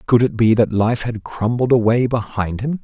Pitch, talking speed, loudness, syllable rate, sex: 115 Hz, 210 wpm, -18 LUFS, 4.8 syllables/s, male